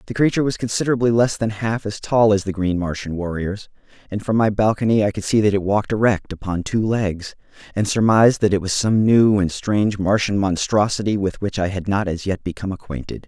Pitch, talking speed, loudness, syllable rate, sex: 100 Hz, 215 wpm, -19 LUFS, 5.9 syllables/s, male